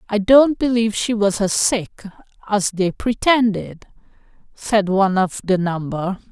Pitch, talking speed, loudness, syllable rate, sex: 205 Hz, 145 wpm, -18 LUFS, 4.3 syllables/s, female